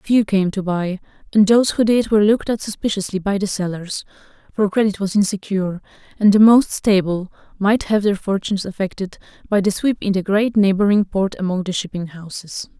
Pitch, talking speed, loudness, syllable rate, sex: 200 Hz, 190 wpm, -18 LUFS, 5.6 syllables/s, female